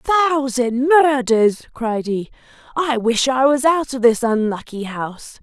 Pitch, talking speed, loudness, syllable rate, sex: 250 Hz, 145 wpm, -18 LUFS, 4.2 syllables/s, female